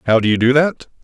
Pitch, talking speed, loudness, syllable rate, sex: 130 Hz, 290 wpm, -15 LUFS, 6.6 syllables/s, male